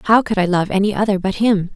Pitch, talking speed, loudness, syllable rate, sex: 200 Hz, 275 wpm, -17 LUFS, 6.3 syllables/s, female